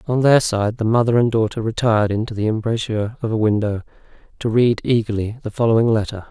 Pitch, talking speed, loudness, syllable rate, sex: 110 Hz, 190 wpm, -19 LUFS, 6.3 syllables/s, male